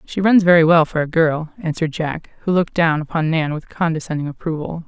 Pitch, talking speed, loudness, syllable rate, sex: 160 Hz, 210 wpm, -18 LUFS, 6.0 syllables/s, female